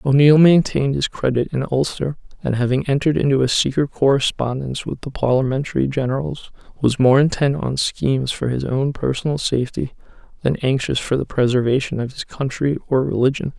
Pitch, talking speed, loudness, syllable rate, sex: 135 Hz, 165 wpm, -19 LUFS, 5.7 syllables/s, male